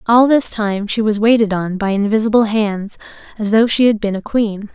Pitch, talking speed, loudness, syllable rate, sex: 215 Hz, 215 wpm, -15 LUFS, 5.1 syllables/s, female